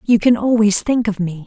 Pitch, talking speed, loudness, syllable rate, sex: 215 Hz, 245 wpm, -16 LUFS, 5.2 syllables/s, female